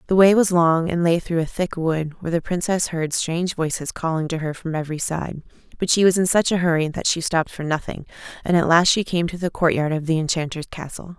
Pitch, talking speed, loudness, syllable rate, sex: 170 Hz, 245 wpm, -21 LUFS, 5.9 syllables/s, female